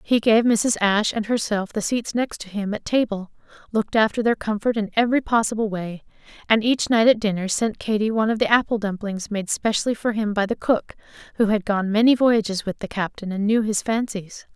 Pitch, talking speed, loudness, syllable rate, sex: 215 Hz, 215 wpm, -21 LUFS, 5.6 syllables/s, female